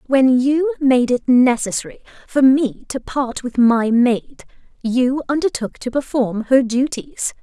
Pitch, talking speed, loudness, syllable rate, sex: 255 Hz, 145 wpm, -17 LUFS, 3.9 syllables/s, female